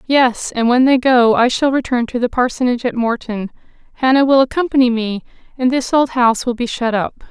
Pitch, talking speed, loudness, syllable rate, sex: 245 Hz, 205 wpm, -15 LUFS, 5.6 syllables/s, female